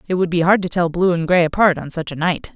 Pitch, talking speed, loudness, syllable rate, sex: 175 Hz, 330 wpm, -17 LUFS, 6.3 syllables/s, female